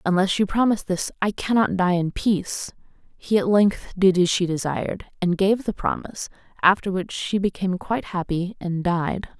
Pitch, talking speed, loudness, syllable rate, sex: 190 Hz, 180 wpm, -22 LUFS, 5.2 syllables/s, female